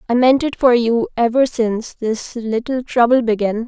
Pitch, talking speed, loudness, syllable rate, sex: 240 Hz, 180 wpm, -17 LUFS, 4.7 syllables/s, female